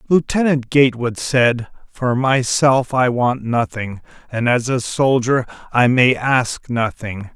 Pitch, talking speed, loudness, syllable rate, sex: 125 Hz, 130 wpm, -17 LUFS, 3.7 syllables/s, male